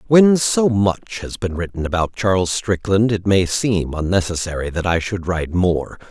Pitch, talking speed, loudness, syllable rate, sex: 95 Hz, 175 wpm, -19 LUFS, 4.6 syllables/s, male